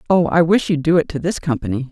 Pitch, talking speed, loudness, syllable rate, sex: 155 Hz, 280 wpm, -17 LUFS, 6.4 syllables/s, male